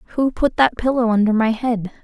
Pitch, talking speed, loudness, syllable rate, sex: 230 Hz, 205 wpm, -18 LUFS, 4.8 syllables/s, female